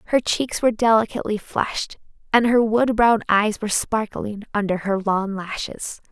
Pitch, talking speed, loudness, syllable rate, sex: 215 Hz, 155 wpm, -21 LUFS, 4.9 syllables/s, female